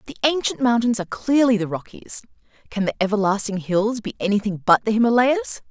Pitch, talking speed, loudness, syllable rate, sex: 220 Hz, 170 wpm, -20 LUFS, 5.8 syllables/s, female